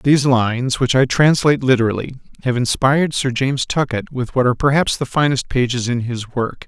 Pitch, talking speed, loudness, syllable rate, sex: 130 Hz, 190 wpm, -17 LUFS, 5.7 syllables/s, male